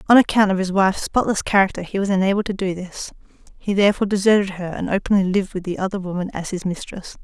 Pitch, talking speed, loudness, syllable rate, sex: 190 Hz, 225 wpm, -20 LUFS, 6.9 syllables/s, female